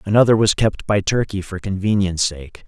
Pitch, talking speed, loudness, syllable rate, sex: 100 Hz, 180 wpm, -18 LUFS, 5.5 syllables/s, male